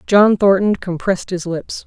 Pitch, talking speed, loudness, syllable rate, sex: 190 Hz, 160 wpm, -16 LUFS, 4.6 syllables/s, female